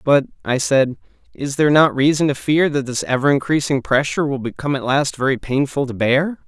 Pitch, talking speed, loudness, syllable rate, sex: 140 Hz, 205 wpm, -18 LUFS, 5.7 syllables/s, male